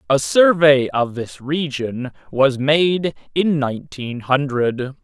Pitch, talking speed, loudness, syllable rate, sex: 135 Hz, 120 wpm, -18 LUFS, 3.4 syllables/s, male